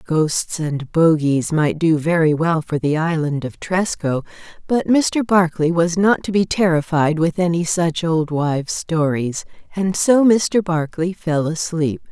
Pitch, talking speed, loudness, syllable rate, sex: 165 Hz, 160 wpm, -18 LUFS, 4.1 syllables/s, female